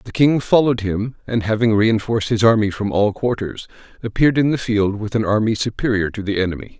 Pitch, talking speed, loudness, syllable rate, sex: 110 Hz, 205 wpm, -18 LUFS, 6.0 syllables/s, male